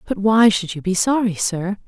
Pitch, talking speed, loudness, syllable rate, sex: 200 Hz, 225 wpm, -18 LUFS, 4.7 syllables/s, female